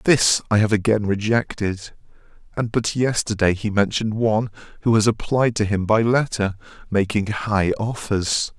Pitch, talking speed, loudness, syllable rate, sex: 105 Hz, 145 wpm, -20 LUFS, 4.7 syllables/s, male